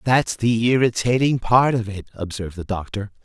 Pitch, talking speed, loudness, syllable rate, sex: 110 Hz, 165 wpm, -20 LUFS, 5.1 syllables/s, male